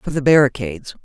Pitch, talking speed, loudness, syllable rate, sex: 145 Hz, 175 wpm, -15 LUFS, 6.4 syllables/s, female